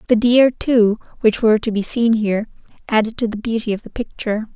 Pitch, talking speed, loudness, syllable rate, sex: 225 Hz, 210 wpm, -18 LUFS, 6.0 syllables/s, female